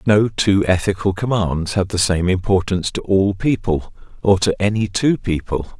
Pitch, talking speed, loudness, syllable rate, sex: 95 Hz, 165 wpm, -18 LUFS, 4.7 syllables/s, male